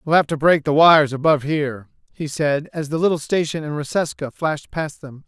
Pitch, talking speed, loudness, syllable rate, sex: 150 Hz, 215 wpm, -19 LUFS, 5.7 syllables/s, male